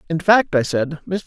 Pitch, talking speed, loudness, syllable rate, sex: 165 Hz, 240 wpm, -18 LUFS, 5.0 syllables/s, male